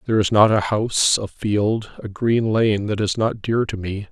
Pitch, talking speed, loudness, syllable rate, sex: 105 Hz, 235 wpm, -20 LUFS, 4.6 syllables/s, male